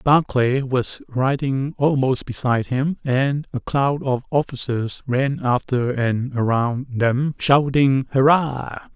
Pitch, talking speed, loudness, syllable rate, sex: 130 Hz, 120 wpm, -20 LUFS, 3.6 syllables/s, male